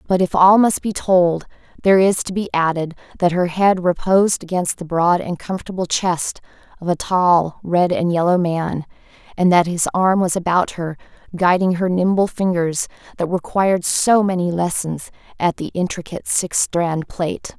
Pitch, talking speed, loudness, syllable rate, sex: 180 Hz, 170 wpm, -18 LUFS, 4.7 syllables/s, female